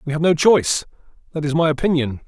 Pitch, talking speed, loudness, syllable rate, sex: 155 Hz, 210 wpm, -18 LUFS, 6.8 syllables/s, male